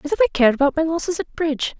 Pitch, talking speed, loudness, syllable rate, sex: 310 Hz, 300 wpm, -19 LUFS, 8.3 syllables/s, female